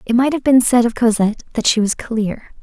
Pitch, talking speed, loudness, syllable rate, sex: 235 Hz, 250 wpm, -16 LUFS, 5.6 syllables/s, female